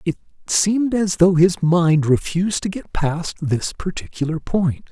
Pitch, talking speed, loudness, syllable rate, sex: 175 Hz, 160 wpm, -19 LUFS, 4.3 syllables/s, male